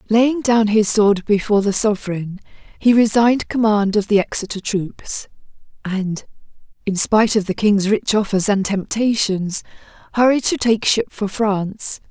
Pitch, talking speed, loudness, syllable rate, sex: 210 Hz, 150 wpm, -18 LUFS, 4.6 syllables/s, female